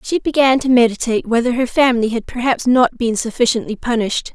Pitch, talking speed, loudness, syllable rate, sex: 240 Hz, 180 wpm, -16 LUFS, 6.1 syllables/s, female